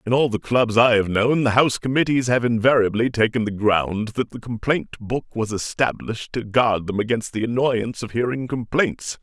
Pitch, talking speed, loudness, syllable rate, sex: 115 Hz, 195 wpm, -21 LUFS, 5.1 syllables/s, male